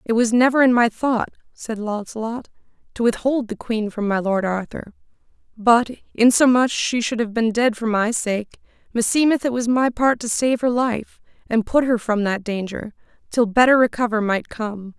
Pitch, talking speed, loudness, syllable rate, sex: 230 Hz, 185 wpm, -20 LUFS, 4.7 syllables/s, female